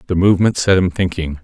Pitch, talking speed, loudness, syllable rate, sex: 90 Hz, 210 wpm, -15 LUFS, 6.4 syllables/s, male